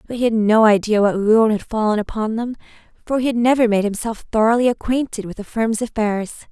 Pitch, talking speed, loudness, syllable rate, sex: 220 Hz, 210 wpm, -18 LUFS, 5.9 syllables/s, female